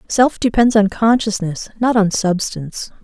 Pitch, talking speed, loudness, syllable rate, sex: 210 Hz, 140 wpm, -16 LUFS, 4.4 syllables/s, female